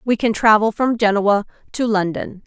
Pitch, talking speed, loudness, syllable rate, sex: 215 Hz, 170 wpm, -17 LUFS, 4.8 syllables/s, female